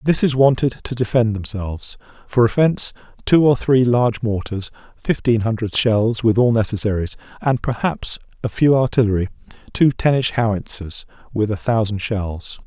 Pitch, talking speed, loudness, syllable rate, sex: 115 Hz, 145 wpm, -19 LUFS, 5.0 syllables/s, male